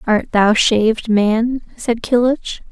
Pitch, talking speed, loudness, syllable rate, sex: 225 Hz, 135 wpm, -16 LUFS, 3.5 syllables/s, female